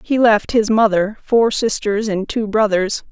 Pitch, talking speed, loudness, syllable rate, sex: 215 Hz, 175 wpm, -16 LUFS, 4.1 syllables/s, female